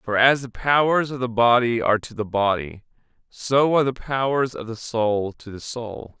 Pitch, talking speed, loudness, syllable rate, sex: 120 Hz, 205 wpm, -21 LUFS, 4.8 syllables/s, male